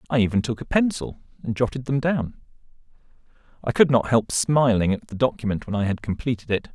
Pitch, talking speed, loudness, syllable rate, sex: 120 Hz, 195 wpm, -23 LUFS, 6.0 syllables/s, male